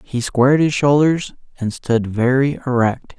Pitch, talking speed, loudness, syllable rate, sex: 130 Hz, 150 wpm, -17 LUFS, 4.2 syllables/s, male